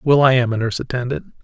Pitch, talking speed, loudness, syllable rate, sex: 130 Hz, 250 wpm, -18 LUFS, 7.2 syllables/s, male